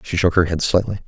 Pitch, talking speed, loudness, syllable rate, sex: 90 Hz, 280 wpm, -18 LUFS, 6.6 syllables/s, male